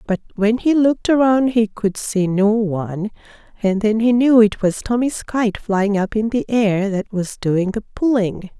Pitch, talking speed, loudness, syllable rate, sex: 215 Hz, 195 wpm, -18 LUFS, 4.4 syllables/s, female